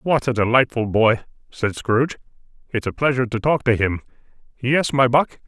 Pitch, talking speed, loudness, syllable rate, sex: 125 Hz, 175 wpm, -20 LUFS, 5.3 syllables/s, male